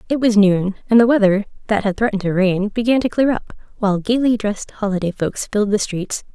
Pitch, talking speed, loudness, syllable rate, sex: 210 Hz, 210 wpm, -18 LUFS, 5.9 syllables/s, female